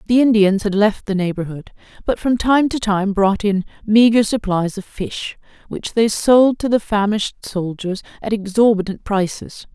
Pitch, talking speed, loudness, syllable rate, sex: 210 Hz, 165 wpm, -17 LUFS, 4.6 syllables/s, female